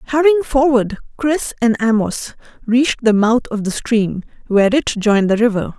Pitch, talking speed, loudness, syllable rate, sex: 235 Hz, 165 wpm, -16 LUFS, 5.2 syllables/s, female